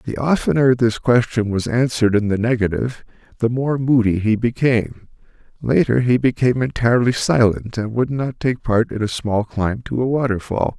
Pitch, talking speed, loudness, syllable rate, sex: 115 Hz, 170 wpm, -18 LUFS, 5.2 syllables/s, male